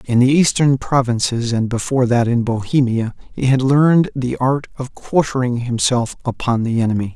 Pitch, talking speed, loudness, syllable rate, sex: 125 Hz, 170 wpm, -17 LUFS, 5.0 syllables/s, male